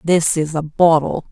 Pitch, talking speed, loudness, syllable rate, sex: 160 Hz, 180 wpm, -16 LUFS, 4.2 syllables/s, female